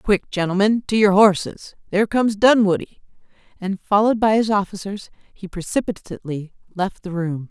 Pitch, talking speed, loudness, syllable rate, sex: 200 Hz, 145 wpm, -19 LUFS, 5.3 syllables/s, female